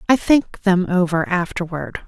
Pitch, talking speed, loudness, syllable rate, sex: 185 Hz, 145 wpm, -19 LUFS, 4.2 syllables/s, female